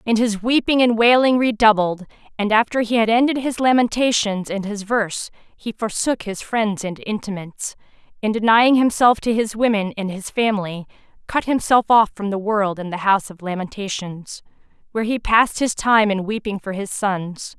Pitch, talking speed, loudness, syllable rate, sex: 215 Hz, 175 wpm, -19 LUFS, 5.1 syllables/s, female